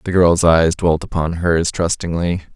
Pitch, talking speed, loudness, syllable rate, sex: 85 Hz, 165 wpm, -16 LUFS, 4.3 syllables/s, male